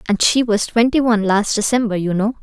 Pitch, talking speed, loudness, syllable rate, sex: 220 Hz, 225 wpm, -16 LUFS, 5.8 syllables/s, female